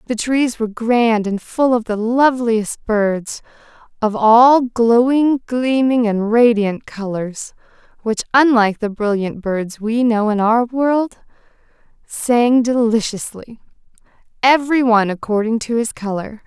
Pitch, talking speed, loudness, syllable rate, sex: 230 Hz, 130 wpm, -16 LUFS, 4.0 syllables/s, female